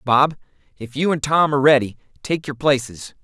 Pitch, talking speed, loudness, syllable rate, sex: 135 Hz, 185 wpm, -18 LUFS, 5.3 syllables/s, male